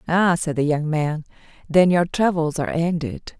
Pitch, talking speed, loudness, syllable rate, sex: 165 Hz, 175 wpm, -20 LUFS, 4.7 syllables/s, female